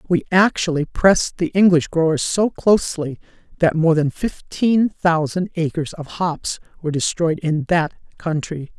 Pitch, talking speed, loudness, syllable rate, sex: 170 Hz, 145 wpm, -19 LUFS, 4.5 syllables/s, female